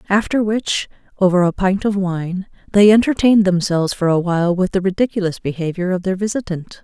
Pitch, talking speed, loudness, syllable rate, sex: 190 Hz, 175 wpm, -17 LUFS, 5.8 syllables/s, female